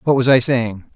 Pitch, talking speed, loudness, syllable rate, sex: 125 Hz, 250 wpm, -15 LUFS, 5.1 syllables/s, male